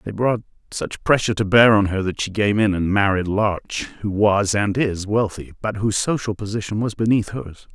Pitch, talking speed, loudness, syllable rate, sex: 105 Hz, 210 wpm, -20 LUFS, 5.1 syllables/s, male